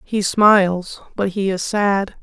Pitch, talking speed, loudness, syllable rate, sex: 195 Hz, 160 wpm, -17 LUFS, 3.6 syllables/s, female